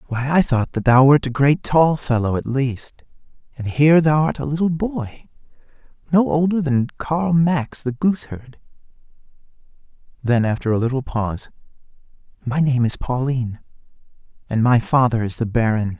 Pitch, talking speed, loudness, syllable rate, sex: 135 Hz, 150 wpm, -19 LUFS, 5.0 syllables/s, male